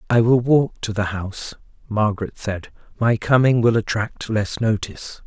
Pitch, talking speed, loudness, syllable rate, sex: 110 Hz, 160 wpm, -20 LUFS, 4.8 syllables/s, male